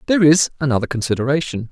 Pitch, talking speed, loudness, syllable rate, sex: 140 Hz, 140 wpm, -17 LUFS, 7.6 syllables/s, male